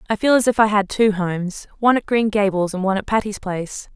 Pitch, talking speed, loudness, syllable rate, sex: 205 Hz, 245 wpm, -19 LUFS, 6.4 syllables/s, female